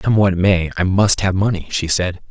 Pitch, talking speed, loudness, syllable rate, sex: 95 Hz, 235 wpm, -17 LUFS, 4.7 syllables/s, male